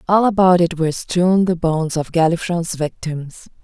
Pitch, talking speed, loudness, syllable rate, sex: 170 Hz, 165 wpm, -17 LUFS, 4.8 syllables/s, female